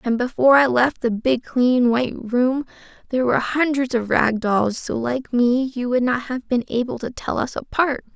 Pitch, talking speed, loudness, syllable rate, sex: 245 Hz, 205 wpm, -20 LUFS, 4.8 syllables/s, female